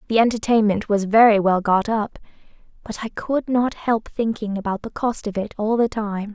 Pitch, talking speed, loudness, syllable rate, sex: 215 Hz, 200 wpm, -20 LUFS, 5.0 syllables/s, female